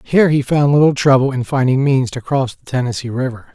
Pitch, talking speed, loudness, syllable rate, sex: 135 Hz, 220 wpm, -15 LUFS, 6.0 syllables/s, male